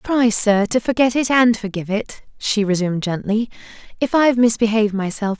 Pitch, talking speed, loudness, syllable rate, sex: 220 Hz, 180 wpm, -18 LUFS, 5.5 syllables/s, female